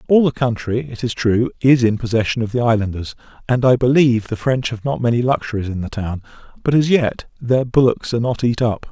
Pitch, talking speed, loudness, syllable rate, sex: 120 Hz, 220 wpm, -18 LUFS, 5.8 syllables/s, male